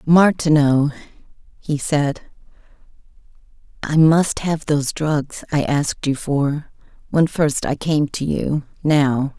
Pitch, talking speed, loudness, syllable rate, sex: 150 Hz, 120 wpm, -19 LUFS, 3.3 syllables/s, female